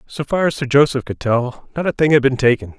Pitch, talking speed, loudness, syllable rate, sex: 135 Hz, 280 wpm, -17 LUFS, 5.8 syllables/s, male